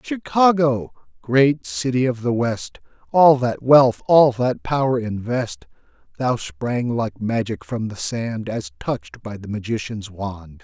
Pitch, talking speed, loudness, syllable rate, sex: 120 Hz, 145 wpm, -20 LUFS, 3.8 syllables/s, male